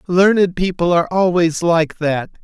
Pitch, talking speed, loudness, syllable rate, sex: 175 Hz, 150 wpm, -16 LUFS, 4.6 syllables/s, male